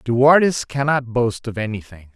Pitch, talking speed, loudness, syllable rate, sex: 125 Hz, 165 wpm, -18 LUFS, 4.8 syllables/s, male